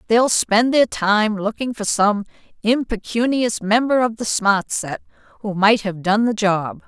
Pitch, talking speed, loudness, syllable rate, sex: 215 Hz, 165 wpm, -18 LUFS, 4.1 syllables/s, female